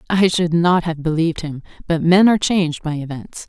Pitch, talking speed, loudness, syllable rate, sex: 170 Hz, 205 wpm, -17 LUFS, 5.6 syllables/s, female